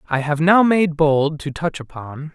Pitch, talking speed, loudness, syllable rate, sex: 155 Hz, 205 wpm, -17 LUFS, 4.2 syllables/s, male